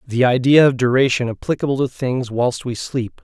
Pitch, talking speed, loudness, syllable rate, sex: 125 Hz, 185 wpm, -18 LUFS, 5.1 syllables/s, male